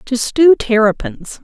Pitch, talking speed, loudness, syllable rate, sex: 235 Hz, 125 wpm, -13 LUFS, 3.9 syllables/s, female